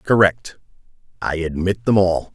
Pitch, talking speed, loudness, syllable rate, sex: 95 Hz, 130 wpm, -19 LUFS, 4.3 syllables/s, male